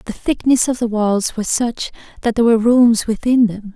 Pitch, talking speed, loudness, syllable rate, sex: 230 Hz, 210 wpm, -16 LUFS, 5.2 syllables/s, female